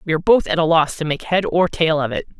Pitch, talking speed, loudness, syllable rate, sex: 165 Hz, 325 wpm, -18 LUFS, 6.4 syllables/s, female